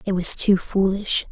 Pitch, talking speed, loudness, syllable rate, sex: 190 Hz, 180 wpm, -20 LUFS, 4.3 syllables/s, female